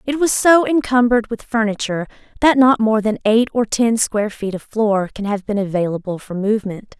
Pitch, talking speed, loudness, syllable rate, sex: 220 Hz, 195 wpm, -17 LUFS, 5.4 syllables/s, female